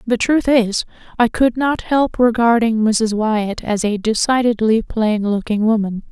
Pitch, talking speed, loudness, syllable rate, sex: 225 Hz, 155 wpm, -16 LUFS, 4.1 syllables/s, female